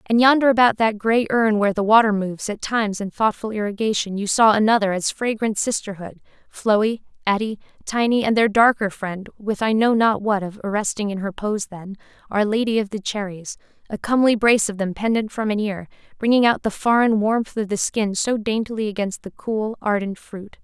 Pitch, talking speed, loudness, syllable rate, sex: 210 Hz, 200 wpm, -20 LUFS, 5.4 syllables/s, female